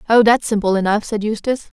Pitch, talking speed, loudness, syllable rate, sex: 215 Hz, 200 wpm, -17 LUFS, 6.6 syllables/s, female